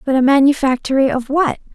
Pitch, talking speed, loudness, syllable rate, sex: 270 Hz, 170 wpm, -15 LUFS, 6.0 syllables/s, female